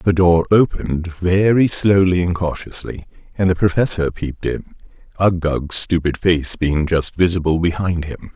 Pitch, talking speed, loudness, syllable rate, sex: 85 Hz, 145 wpm, -17 LUFS, 4.6 syllables/s, male